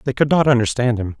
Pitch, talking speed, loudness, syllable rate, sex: 125 Hz, 250 wpm, -17 LUFS, 6.5 syllables/s, male